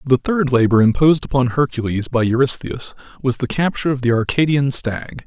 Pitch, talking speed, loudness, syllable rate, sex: 130 Hz, 170 wpm, -17 LUFS, 5.5 syllables/s, male